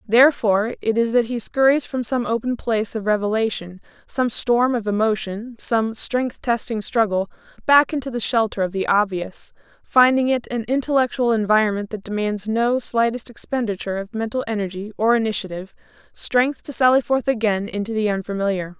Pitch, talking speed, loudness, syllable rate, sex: 225 Hz, 160 wpm, -21 LUFS, 5.3 syllables/s, female